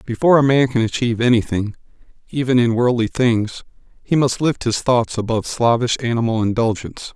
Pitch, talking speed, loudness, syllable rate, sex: 120 Hz, 160 wpm, -18 LUFS, 5.8 syllables/s, male